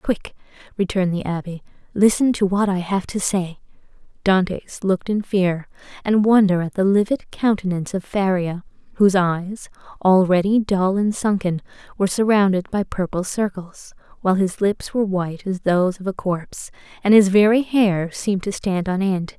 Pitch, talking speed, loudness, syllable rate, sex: 190 Hz, 165 wpm, -20 LUFS, 5.1 syllables/s, female